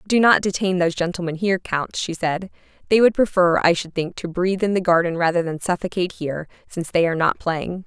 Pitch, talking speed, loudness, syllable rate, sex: 180 Hz, 220 wpm, -20 LUFS, 6.2 syllables/s, female